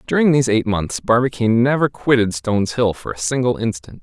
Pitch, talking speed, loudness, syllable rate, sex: 115 Hz, 195 wpm, -18 LUFS, 5.9 syllables/s, male